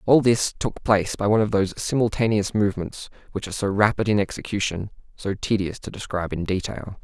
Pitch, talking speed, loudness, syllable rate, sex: 100 Hz, 190 wpm, -23 LUFS, 6.2 syllables/s, male